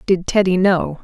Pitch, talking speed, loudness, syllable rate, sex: 185 Hz, 175 wpm, -16 LUFS, 4.4 syllables/s, female